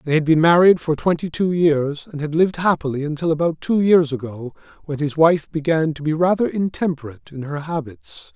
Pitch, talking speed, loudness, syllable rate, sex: 160 Hz, 200 wpm, -19 LUFS, 5.5 syllables/s, male